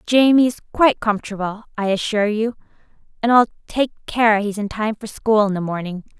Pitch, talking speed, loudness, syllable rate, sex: 215 Hz, 185 wpm, -19 LUFS, 5.8 syllables/s, female